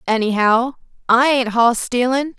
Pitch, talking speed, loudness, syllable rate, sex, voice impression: 245 Hz, 125 wpm, -16 LUFS, 4.1 syllables/s, female, feminine, slightly young, tensed, slightly hard, clear, fluent, intellectual, unique, sharp